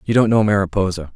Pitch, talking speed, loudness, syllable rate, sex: 100 Hz, 210 wpm, -17 LUFS, 6.7 syllables/s, male